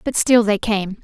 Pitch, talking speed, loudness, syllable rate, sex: 215 Hz, 230 wpm, -17 LUFS, 4.4 syllables/s, female